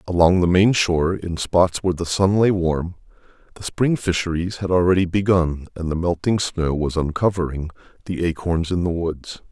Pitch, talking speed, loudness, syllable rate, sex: 85 Hz, 175 wpm, -20 LUFS, 5.0 syllables/s, male